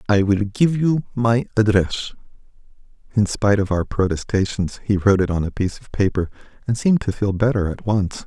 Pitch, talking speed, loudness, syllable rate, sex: 105 Hz, 190 wpm, -20 LUFS, 5.5 syllables/s, male